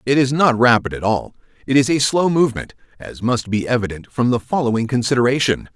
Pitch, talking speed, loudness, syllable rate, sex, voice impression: 125 Hz, 200 wpm, -18 LUFS, 5.9 syllables/s, male, very masculine, very adult-like, middle-aged, very thick, very tensed, very powerful, very bright, hard, very clear, very fluent, slightly raspy, very cool, very intellectual, sincere, slightly calm, very mature, very friendly, very reassuring, very unique, slightly elegant, very wild, slightly sweet, very lively, kind, very intense